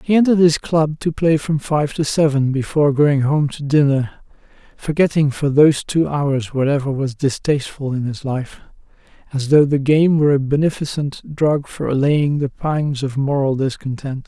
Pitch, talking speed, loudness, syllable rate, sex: 145 Hz, 170 wpm, -17 LUFS, 4.9 syllables/s, male